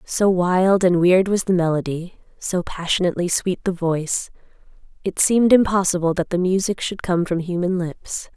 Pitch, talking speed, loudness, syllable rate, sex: 180 Hz, 165 wpm, -20 LUFS, 4.9 syllables/s, female